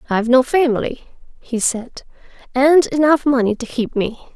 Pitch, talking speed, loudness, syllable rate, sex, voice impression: 255 Hz, 150 wpm, -17 LUFS, 4.7 syllables/s, female, feminine, slightly young, slightly refreshing, slightly calm, friendly